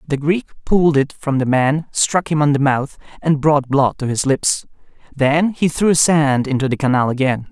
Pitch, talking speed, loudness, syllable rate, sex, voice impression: 145 Hz, 205 wpm, -17 LUFS, 4.6 syllables/s, male, masculine, slightly adult-like, fluent, refreshing, friendly